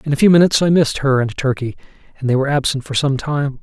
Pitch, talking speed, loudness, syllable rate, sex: 140 Hz, 265 wpm, -16 LUFS, 7.0 syllables/s, male